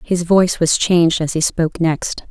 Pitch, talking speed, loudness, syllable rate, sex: 170 Hz, 210 wpm, -16 LUFS, 5.1 syllables/s, female